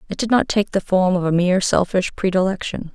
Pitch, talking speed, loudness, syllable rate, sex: 185 Hz, 225 wpm, -19 LUFS, 5.8 syllables/s, female